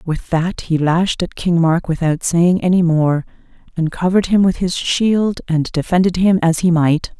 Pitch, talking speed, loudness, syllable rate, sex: 175 Hz, 190 wpm, -16 LUFS, 4.5 syllables/s, female